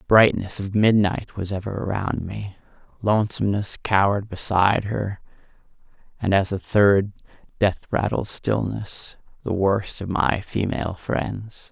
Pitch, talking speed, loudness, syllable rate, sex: 100 Hz, 125 wpm, -23 LUFS, 4.3 syllables/s, male